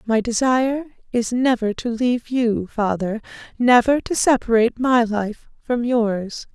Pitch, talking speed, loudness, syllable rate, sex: 235 Hz, 135 wpm, -20 LUFS, 4.3 syllables/s, female